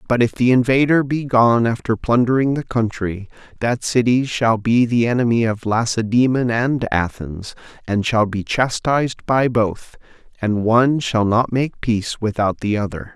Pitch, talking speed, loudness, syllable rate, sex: 115 Hz, 160 wpm, -18 LUFS, 4.5 syllables/s, male